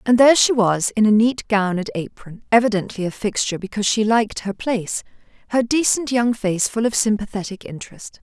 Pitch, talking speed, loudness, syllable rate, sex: 220 Hz, 175 wpm, -19 LUFS, 5.8 syllables/s, female